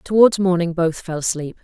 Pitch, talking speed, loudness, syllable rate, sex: 175 Hz, 185 wpm, -18 LUFS, 5.2 syllables/s, female